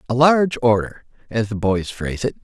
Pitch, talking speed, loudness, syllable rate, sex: 115 Hz, 195 wpm, -19 LUFS, 5.7 syllables/s, male